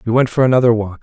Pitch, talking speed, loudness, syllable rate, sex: 120 Hz, 295 wpm, -14 LUFS, 7.7 syllables/s, male